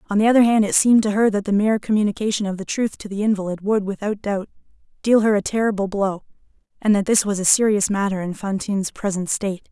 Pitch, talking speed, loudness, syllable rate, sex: 205 Hz, 230 wpm, -20 LUFS, 6.6 syllables/s, female